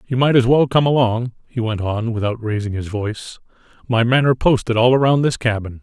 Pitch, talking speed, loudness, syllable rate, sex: 120 Hz, 215 wpm, -18 LUFS, 5.7 syllables/s, male